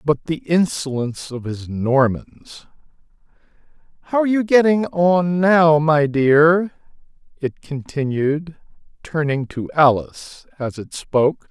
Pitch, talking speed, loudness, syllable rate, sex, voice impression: 150 Hz, 115 wpm, -18 LUFS, 3.9 syllables/s, male, masculine, adult-like, slightly clear, slightly cool, unique, slightly kind